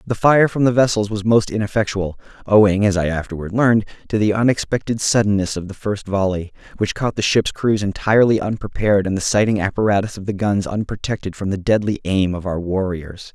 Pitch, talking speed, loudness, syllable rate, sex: 100 Hz, 195 wpm, -18 LUFS, 5.8 syllables/s, male